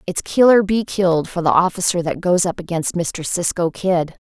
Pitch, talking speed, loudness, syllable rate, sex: 180 Hz, 210 wpm, -18 LUFS, 4.9 syllables/s, female